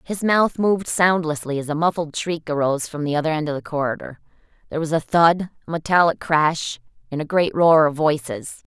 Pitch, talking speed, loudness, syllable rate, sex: 160 Hz, 200 wpm, -20 LUFS, 5.5 syllables/s, female